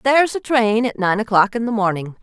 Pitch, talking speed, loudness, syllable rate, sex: 220 Hz, 245 wpm, -18 LUFS, 5.7 syllables/s, female